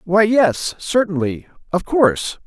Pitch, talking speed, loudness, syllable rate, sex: 180 Hz, 120 wpm, -18 LUFS, 4.0 syllables/s, male